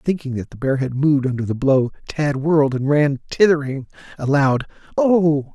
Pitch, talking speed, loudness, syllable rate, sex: 145 Hz, 185 wpm, -19 LUFS, 5.0 syllables/s, male